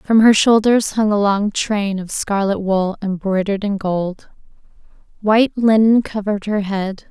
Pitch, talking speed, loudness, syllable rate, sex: 205 Hz, 150 wpm, -17 LUFS, 4.4 syllables/s, female